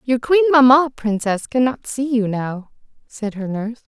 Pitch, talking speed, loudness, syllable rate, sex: 240 Hz, 165 wpm, -18 LUFS, 4.5 syllables/s, female